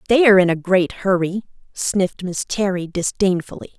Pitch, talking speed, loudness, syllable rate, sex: 190 Hz, 160 wpm, -18 LUFS, 5.3 syllables/s, female